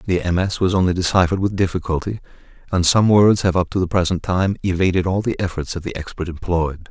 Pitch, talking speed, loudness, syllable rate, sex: 90 Hz, 210 wpm, -19 LUFS, 6.1 syllables/s, male